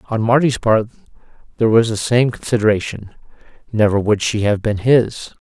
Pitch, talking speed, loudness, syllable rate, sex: 110 Hz, 155 wpm, -16 LUFS, 5.3 syllables/s, male